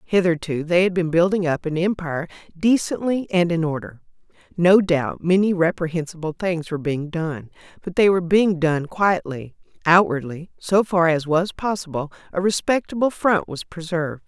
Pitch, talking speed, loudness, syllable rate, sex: 170 Hz, 155 wpm, -21 LUFS, 5.0 syllables/s, female